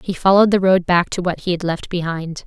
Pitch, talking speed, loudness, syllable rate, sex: 180 Hz, 270 wpm, -17 LUFS, 5.9 syllables/s, female